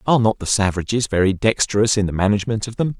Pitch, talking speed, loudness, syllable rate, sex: 105 Hz, 220 wpm, -19 LUFS, 7.0 syllables/s, male